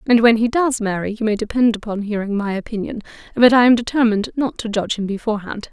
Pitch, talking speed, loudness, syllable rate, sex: 220 Hz, 220 wpm, -18 LUFS, 6.6 syllables/s, female